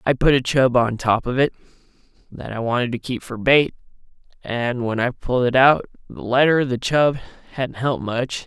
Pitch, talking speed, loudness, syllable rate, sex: 125 Hz, 185 wpm, -20 LUFS, 5.0 syllables/s, male